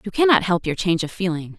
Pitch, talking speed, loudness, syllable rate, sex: 185 Hz, 265 wpm, -20 LUFS, 6.7 syllables/s, female